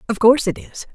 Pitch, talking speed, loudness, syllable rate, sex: 230 Hz, 255 wpm, -17 LUFS, 6.9 syllables/s, female